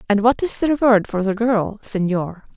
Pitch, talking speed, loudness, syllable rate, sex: 215 Hz, 210 wpm, -19 LUFS, 4.8 syllables/s, female